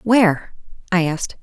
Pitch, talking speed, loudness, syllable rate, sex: 190 Hz, 125 wpm, -19 LUFS, 5.0 syllables/s, female